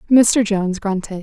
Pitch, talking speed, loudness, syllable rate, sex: 205 Hz, 145 wpm, -17 LUFS, 4.9 syllables/s, female